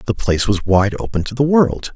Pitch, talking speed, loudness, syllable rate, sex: 115 Hz, 245 wpm, -17 LUFS, 5.6 syllables/s, male